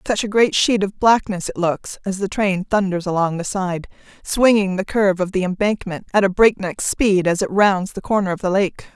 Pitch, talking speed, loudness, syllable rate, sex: 195 Hz, 220 wpm, -19 LUFS, 5.1 syllables/s, female